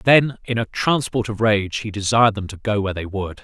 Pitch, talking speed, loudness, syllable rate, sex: 105 Hz, 245 wpm, -20 LUFS, 5.4 syllables/s, male